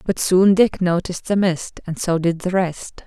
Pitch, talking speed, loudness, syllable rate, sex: 180 Hz, 215 wpm, -19 LUFS, 4.5 syllables/s, female